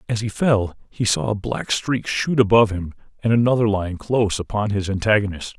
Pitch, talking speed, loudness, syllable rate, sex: 105 Hz, 195 wpm, -20 LUFS, 5.4 syllables/s, male